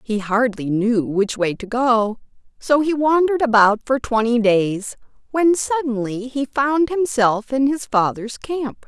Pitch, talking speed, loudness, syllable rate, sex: 245 Hz, 155 wpm, -19 LUFS, 4.0 syllables/s, female